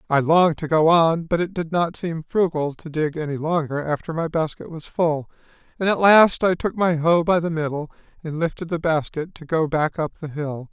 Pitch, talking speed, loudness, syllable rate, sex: 160 Hz, 225 wpm, -21 LUFS, 5.1 syllables/s, male